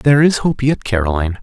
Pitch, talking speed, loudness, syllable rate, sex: 120 Hz, 210 wpm, -15 LUFS, 6.6 syllables/s, male